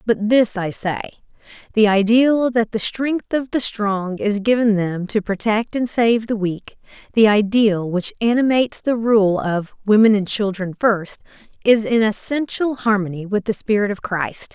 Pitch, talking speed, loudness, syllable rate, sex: 215 Hz, 170 wpm, -18 LUFS, 4.4 syllables/s, female